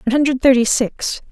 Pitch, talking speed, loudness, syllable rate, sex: 255 Hz, 185 wpm, -16 LUFS, 6.9 syllables/s, female